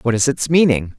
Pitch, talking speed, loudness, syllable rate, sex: 130 Hz, 245 wpm, -16 LUFS, 5.3 syllables/s, male